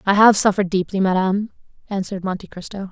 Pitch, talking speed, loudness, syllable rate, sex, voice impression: 195 Hz, 165 wpm, -19 LUFS, 7.0 syllables/s, female, feminine, slightly adult-like, fluent, slightly cute, slightly refreshing, friendly